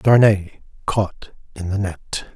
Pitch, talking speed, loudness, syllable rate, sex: 100 Hz, 125 wpm, -20 LUFS, 3.2 syllables/s, male